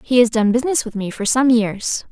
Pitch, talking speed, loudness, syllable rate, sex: 235 Hz, 255 wpm, -17 LUFS, 5.6 syllables/s, female